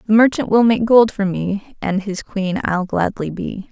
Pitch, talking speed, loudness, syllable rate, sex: 205 Hz, 210 wpm, -17 LUFS, 4.3 syllables/s, female